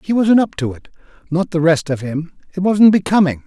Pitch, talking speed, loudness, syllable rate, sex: 170 Hz, 210 wpm, -16 LUFS, 5.4 syllables/s, male